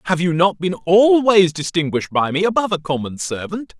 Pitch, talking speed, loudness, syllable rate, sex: 175 Hz, 205 wpm, -17 LUFS, 5.8 syllables/s, male